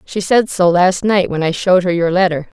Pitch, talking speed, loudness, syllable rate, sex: 180 Hz, 255 wpm, -14 LUFS, 5.3 syllables/s, female